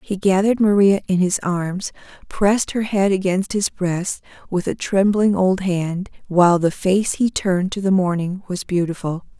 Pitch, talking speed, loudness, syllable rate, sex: 190 Hz, 175 wpm, -19 LUFS, 4.6 syllables/s, female